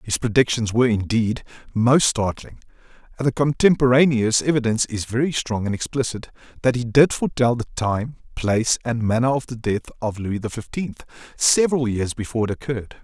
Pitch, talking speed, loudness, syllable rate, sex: 120 Hz, 165 wpm, -21 LUFS, 5.7 syllables/s, male